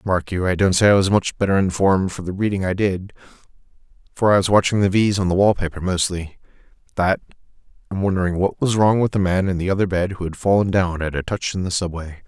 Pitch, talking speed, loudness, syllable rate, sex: 95 Hz, 230 wpm, -19 LUFS, 6.2 syllables/s, male